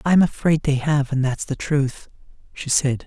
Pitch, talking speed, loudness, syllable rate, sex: 140 Hz, 215 wpm, -20 LUFS, 4.7 syllables/s, male